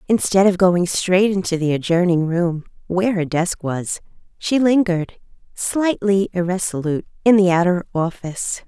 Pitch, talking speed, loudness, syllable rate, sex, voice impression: 185 Hz, 140 wpm, -18 LUFS, 4.9 syllables/s, female, feminine, middle-aged, tensed, powerful, clear, intellectual, calm, friendly, elegant, lively, slightly strict, slightly sharp